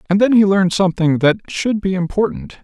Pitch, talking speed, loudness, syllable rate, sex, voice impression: 185 Hz, 205 wpm, -16 LUFS, 6.0 syllables/s, male, very masculine, very adult-like, very middle-aged, thick, slightly tensed, powerful, weak, bright, slightly soft, clear, cool, intellectual, slightly refreshing, sincere, calm, mature, friendly, reassuring, slightly unique, slightly elegant, wild, sweet, slightly lively, kind, slightly modest, slightly light